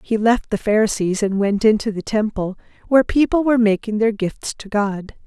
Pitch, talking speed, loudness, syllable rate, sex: 215 Hz, 195 wpm, -19 LUFS, 5.3 syllables/s, female